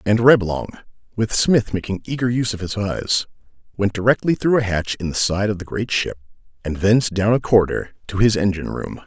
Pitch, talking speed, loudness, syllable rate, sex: 105 Hz, 205 wpm, -19 LUFS, 5.7 syllables/s, male